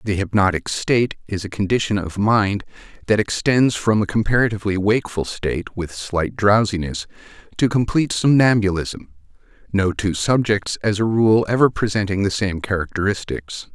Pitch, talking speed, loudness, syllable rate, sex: 100 Hz, 140 wpm, -19 LUFS, 5.1 syllables/s, male